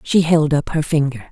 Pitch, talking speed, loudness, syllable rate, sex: 150 Hz, 230 wpm, -17 LUFS, 5.4 syllables/s, female